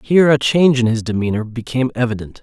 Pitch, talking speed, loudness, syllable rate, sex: 125 Hz, 200 wpm, -16 LUFS, 7.0 syllables/s, male